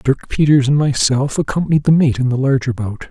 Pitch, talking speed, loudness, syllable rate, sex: 135 Hz, 215 wpm, -15 LUFS, 5.5 syllables/s, male